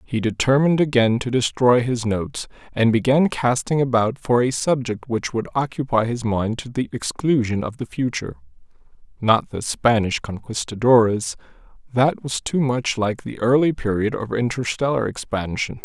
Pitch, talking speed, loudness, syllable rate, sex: 120 Hz, 150 wpm, -21 LUFS, 4.9 syllables/s, male